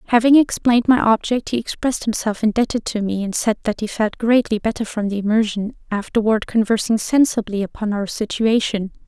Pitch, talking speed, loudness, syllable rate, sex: 220 Hz, 170 wpm, -19 LUFS, 5.7 syllables/s, female